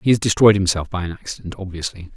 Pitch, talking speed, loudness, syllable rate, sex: 95 Hz, 220 wpm, -19 LUFS, 6.8 syllables/s, male